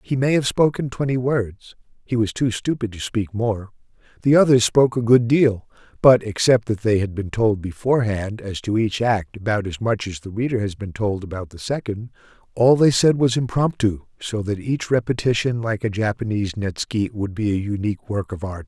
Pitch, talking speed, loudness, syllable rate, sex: 110 Hz, 200 wpm, -21 LUFS, 5.2 syllables/s, male